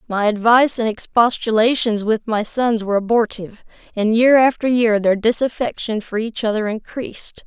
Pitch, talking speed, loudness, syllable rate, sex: 225 Hz, 155 wpm, -17 LUFS, 5.2 syllables/s, female